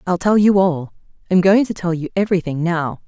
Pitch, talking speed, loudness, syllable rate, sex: 180 Hz, 195 wpm, -17 LUFS, 5.0 syllables/s, female